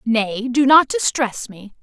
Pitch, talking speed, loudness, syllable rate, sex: 250 Hz, 165 wpm, -17 LUFS, 3.6 syllables/s, female